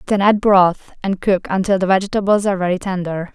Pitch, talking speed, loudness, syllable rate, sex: 190 Hz, 195 wpm, -17 LUFS, 5.9 syllables/s, female